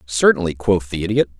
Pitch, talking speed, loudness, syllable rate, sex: 95 Hz, 170 wpm, -18 LUFS, 6.0 syllables/s, male